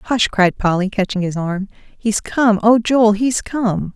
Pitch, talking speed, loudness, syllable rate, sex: 210 Hz, 150 wpm, -17 LUFS, 3.8 syllables/s, female